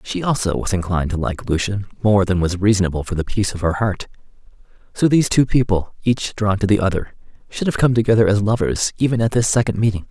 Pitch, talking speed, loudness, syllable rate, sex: 105 Hz, 220 wpm, -18 LUFS, 6.4 syllables/s, male